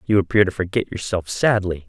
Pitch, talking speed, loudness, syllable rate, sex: 95 Hz, 190 wpm, -20 LUFS, 5.8 syllables/s, male